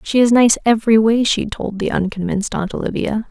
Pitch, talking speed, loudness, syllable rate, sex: 220 Hz, 200 wpm, -16 LUFS, 5.7 syllables/s, female